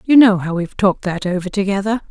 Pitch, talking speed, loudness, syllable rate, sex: 200 Hz, 230 wpm, -17 LUFS, 6.7 syllables/s, female